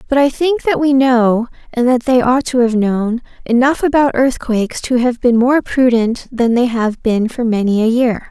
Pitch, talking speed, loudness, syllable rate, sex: 245 Hz, 210 wpm, -14 LUFS, 4.6 syllables/s, female